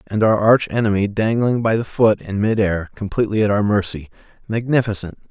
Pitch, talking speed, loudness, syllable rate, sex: 105 Hz, 160 wpm, -18 LUFS, 5.6 syllables/s, male